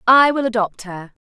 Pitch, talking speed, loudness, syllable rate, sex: 225 Hz, 190 wpm, -17 LUFS, 4.9 syllables/s, female